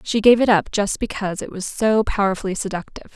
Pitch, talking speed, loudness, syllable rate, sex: 205 Hz, 210 wpm, -20 LUFS, 6.3 syllables/s, female